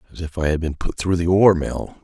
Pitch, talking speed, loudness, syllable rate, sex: 85 Hz, 295 wpm, -19 LUFS, 6.4 syllables/s, male